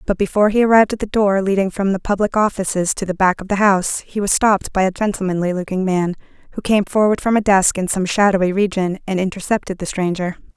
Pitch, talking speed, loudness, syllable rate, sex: 195 Hz, 225 wpm, -17 LUFS, 6.4 syllables/s, female